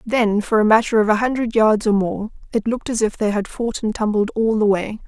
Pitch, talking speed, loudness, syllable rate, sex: 220 Hz, 260 wpm, -19 LUFS, 5.6 syllables/s, female